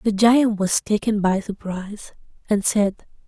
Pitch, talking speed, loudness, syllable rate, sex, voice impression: 205 Hz, 145 wpm, -20 LUFS, 4.3 syllables/s, female, feminine, slightly young, relaxed, powerful, bright, slightly soft, raspy, slightly cute, calm, friendly, reassuring, kind, modest